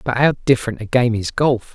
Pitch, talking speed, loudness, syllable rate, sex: 120 Hz, 240 wpm, -18 LUFS, 5.5 syllables/s, male